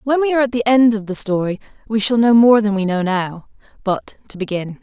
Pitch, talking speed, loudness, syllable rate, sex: 215 Hz, 250 wpm, -16 LUFS, 5.7 syllables/s, female